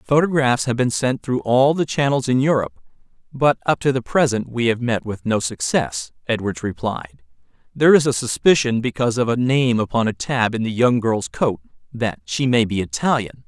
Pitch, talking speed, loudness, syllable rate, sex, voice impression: 125 Hz, 195 wpm, -19 LUFS, 5.2 syllables/s, male, masculine, adult-like, tensed, powerful, bright, clear, fluent, intellectual, friendly, unique, lively, slightly light